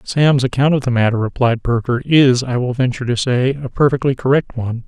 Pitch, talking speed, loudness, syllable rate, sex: 125 Hz, 210 wpm, -16 LUFS, 5.7 syllables/s, male